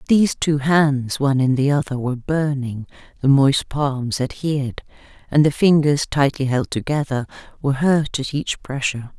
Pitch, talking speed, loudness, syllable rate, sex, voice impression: 140 Hz, 155 wpm, -19 LUFS, 4.9 syllables/s, female, very feminine, slightly gender-neutral, very adult-like, very middle-aged, slightly thin, tensed, slightly powerful, slightly bright, hard, clear, fluent, slightly raspy, slightly cool, very intellectual, slightly refreshing, very sincere, very calm, friendly, reassuring, slightly unique, very elegant, slightly wild, slightly sweet, slightly lively, very kind, slightly intense, slightly modest, slightly light